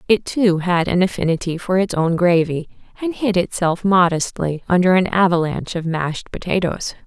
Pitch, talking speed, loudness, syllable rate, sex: 180 Hz, 160 wpm, -18 LUFS, 5.0 syllables/s, female